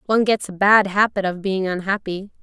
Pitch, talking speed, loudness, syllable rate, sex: 195 Hz, 200 wpm, -19 LUFS, 5.5 syllables/s, female